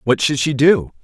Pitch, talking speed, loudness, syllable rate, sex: 140 Hz, 230 wpm, -15 LUFS, 4.7 syllables/s, male